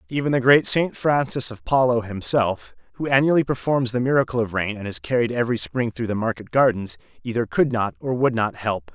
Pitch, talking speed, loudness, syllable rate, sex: 120 Hz, 210 wpm, -21 LUFS, 5.6 syllables/s, male